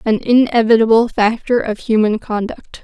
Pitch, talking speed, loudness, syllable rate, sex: 225 Hz, 125 wpm, -14 LUFS, 4.8 syllables/s, female